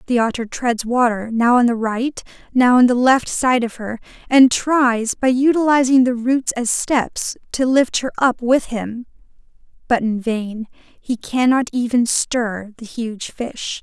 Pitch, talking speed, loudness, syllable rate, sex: 240 Hz, 170 wpm, -17 LUFS, 3.9 syllables/s, female